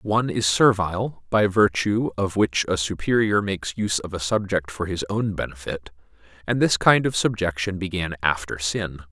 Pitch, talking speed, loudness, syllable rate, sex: 95 Hz, 170 wpm, -22 LUFS, 5.0 syllables/s, male